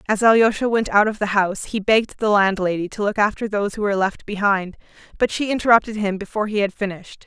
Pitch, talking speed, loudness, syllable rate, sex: 205 Hz, 225 wpm, -19 LUFS, 6.6 syllables/s, female